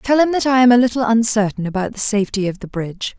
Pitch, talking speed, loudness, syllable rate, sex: 225 Hz, 265 wpm, -17 LUFS, 6.7 syllables/s, female